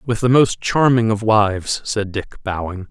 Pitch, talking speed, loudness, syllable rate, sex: 110 Hz, 185 wpm, -18 LUFS, 4.4 syllables/s, male